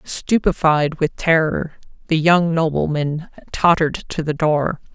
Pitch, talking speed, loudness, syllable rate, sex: 160 Hz, 120 wpm, -18 LUFS, 4.0 syllables/s, female